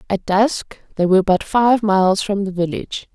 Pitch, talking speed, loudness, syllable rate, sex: 200 Hz, 190 wpm, -17 LUFS, 5.0 syllables/s, female